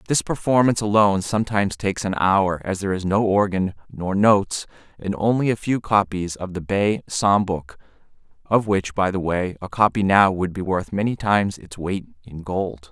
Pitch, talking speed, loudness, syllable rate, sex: 100 Hz, 190 wpm, -21 LUFS, 5.1 syllables/s, male